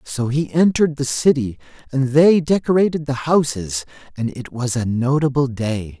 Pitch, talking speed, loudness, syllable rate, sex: 130 Hz, 160 wpm, -19 LUFS, 4.7 syllables/s, male